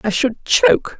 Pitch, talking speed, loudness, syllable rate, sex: 270 Hz, 180 wpm, -15 LUFS, 4.8 syllables/s, female